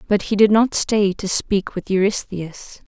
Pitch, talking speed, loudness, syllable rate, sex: 200 Hz, 185 wpm, -19 LUFS, 4.2 syllables/s, female